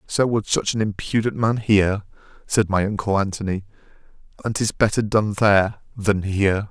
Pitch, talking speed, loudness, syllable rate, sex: 100 Hz, 160 wpm, -21 LUFS, 5.2 syllables/s, male